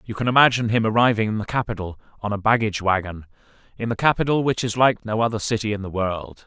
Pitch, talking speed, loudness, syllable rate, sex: 110 Hz, 215 wpm, -21 LUFS, 6.8 syllables/s, male